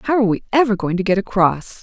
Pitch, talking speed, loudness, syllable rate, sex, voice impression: 210 Hz, 265 wpm, -17 LUFS, 6.4 syllables/s, female, feminine, adult-like, clear, slightly fluent, slightly intellectual, friendly